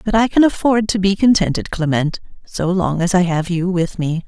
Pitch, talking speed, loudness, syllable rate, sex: 185 Hz, 225 wpm, -17 LUFS, 5.1 syllables/s, female